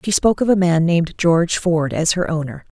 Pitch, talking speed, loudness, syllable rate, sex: 170 Hz, 240 wpm, -17 LUFS, 5.9 syllables/s, female